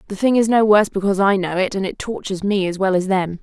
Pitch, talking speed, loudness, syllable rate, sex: 195 Hz, 300 wpm, -18 LUFS, 6.8 syllables/s, female